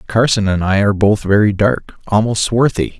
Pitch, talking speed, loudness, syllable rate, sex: 105 Hz, 180 wpm, -14 LUFS, 5.2 syllables/s, male